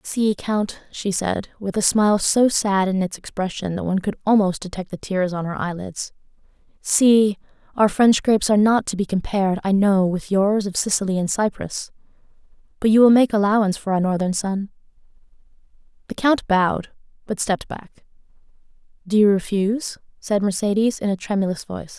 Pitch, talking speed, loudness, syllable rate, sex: 200 Hz, 170 wpm, -20 LUFS, 5.4 syllables/s, female